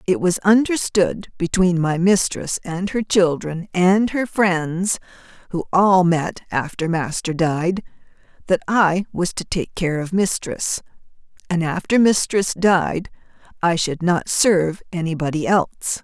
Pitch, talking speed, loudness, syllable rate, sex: 180 Hz, 135 wpm, -19 LUFS, 3.9 syllables/s, female